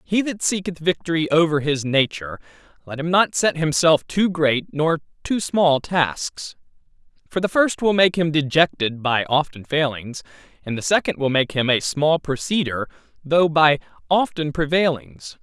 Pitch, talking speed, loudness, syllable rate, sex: 155 Hz, 160 wpm, -20 LUFS, 4.6 syllables/s, male